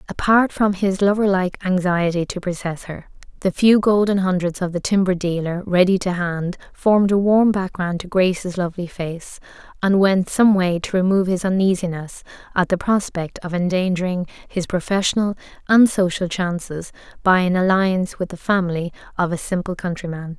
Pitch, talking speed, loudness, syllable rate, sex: 185 Hz, 165 wpm, -19 LUFS, 5.2 syllables/s, female